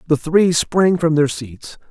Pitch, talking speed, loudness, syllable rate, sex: 155 Hz, 190 wpm, -16 LUFS, 3.7 syllables/s, male